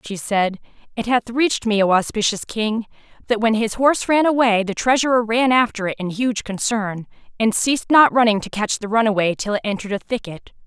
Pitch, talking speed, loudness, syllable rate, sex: 220 Hz, 200 wpm, -19 LUFS, 5.7 syllables/s, female